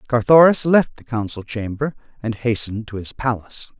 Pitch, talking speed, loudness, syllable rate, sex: 120 Hz, 160 wpm, -19 LUFS, 5.5 syllables/s, male